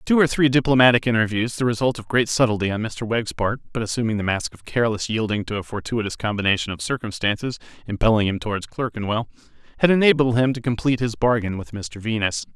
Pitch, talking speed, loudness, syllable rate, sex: 115 Hz, 195 wpm, -21 LUFS, 6.4 syllables/s, male